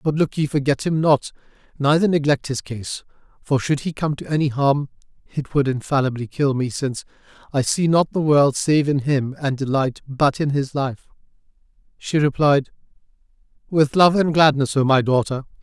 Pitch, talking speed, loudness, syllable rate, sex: 140 Hz, 175 wpm, -20 LUFS, 5.0 syllables/s, male